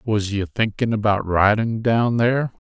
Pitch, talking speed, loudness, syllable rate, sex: 110 Hz, 155 wpm, -20 LUFS, 4.4 syllables/s, male